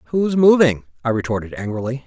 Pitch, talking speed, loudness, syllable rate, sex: 135 Hz, 145 wpm, -18 LUFS, 6.2 syllables/s, male